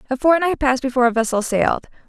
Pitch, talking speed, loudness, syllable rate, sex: 265 Hz, 200 wpm, -18 LUFS, 7.5 syllables/s, female